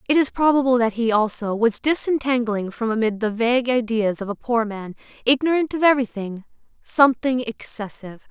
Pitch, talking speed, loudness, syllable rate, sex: 235 Hz, 160 wpm, -21 LUFS, 5.5 syllables/s, female